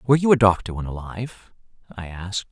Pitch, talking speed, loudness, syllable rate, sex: 105 Hz, 190 wpm, -21 LUFS, 6.3 syllables/s, male